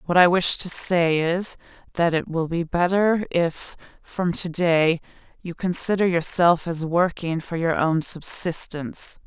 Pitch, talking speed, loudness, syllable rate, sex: 170 Hz, 155 wpm, -21 LUFS, 4.0 syllables/s, female